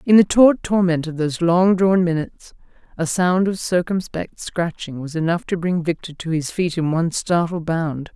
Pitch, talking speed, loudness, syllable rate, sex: 170 Hz, 190 wpm, -19 LUFS, 4.9 syllables/s, female